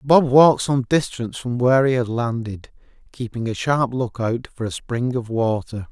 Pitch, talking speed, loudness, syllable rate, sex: 120 Hz, 185 wpm, -20 LUFS, 4.8 syllables/s, male